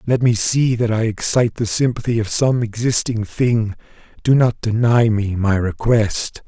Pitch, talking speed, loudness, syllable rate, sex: 115 Hz, 165 wpm, -18 LUFS, 4.5 syllables/s, male